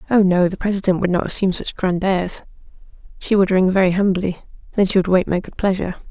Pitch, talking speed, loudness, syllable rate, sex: 185 Hz, 215 wpm, -18 LUFS, 6.6 syllables/s, female